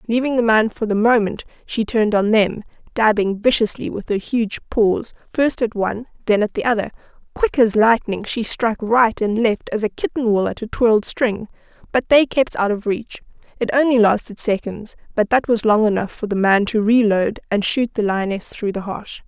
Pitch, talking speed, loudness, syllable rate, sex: 220 Hz, 205 wpm, -18 LUFS, 5.0 syllables/s, female